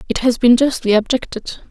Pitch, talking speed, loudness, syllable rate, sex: 240 Hz, 175 wpm, -15 LUFS, 5.4 syllables/s, female